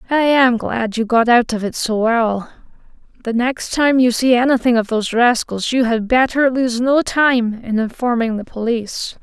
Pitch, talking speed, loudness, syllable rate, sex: 240 Hz, 190 wpm, -16 LUFS, 4.6 syllables/s, female